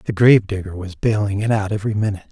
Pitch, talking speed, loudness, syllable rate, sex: 105 Hz, 210 wpm, -18 LUFS, 7.1 syllables/s, male